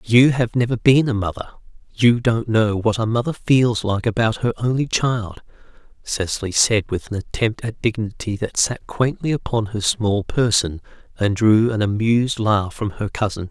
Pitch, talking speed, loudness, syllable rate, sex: 110 Hz, 180 wpm, -19 LUFS, 4.7 syllables/s, male